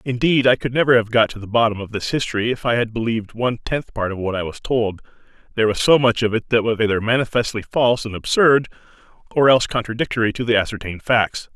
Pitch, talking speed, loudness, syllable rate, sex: 115 Hz, 230 wpm, -19 LUFS, 6.6 syllables/s, male